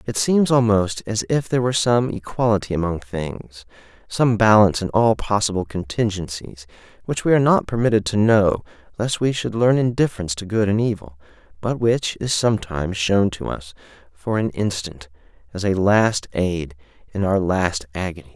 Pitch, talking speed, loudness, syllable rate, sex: 100 Hz, 165 wpm, -20 LUFS, 5.2 syllables/s, male